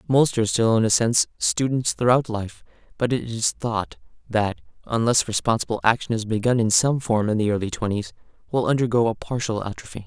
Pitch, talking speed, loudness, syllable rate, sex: 115 Hz, 185 wpm, -22 LUFS, 5.7 syllables/s, male